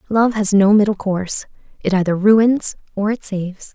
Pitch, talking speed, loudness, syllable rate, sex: 205 Hz, 175 wpm, -17 LUFS, 4.9 syllables/s, female